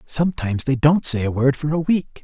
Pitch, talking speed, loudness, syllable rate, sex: 140 Hz, 240 wpm, -19 LUFS, 5.7 syllables/s, male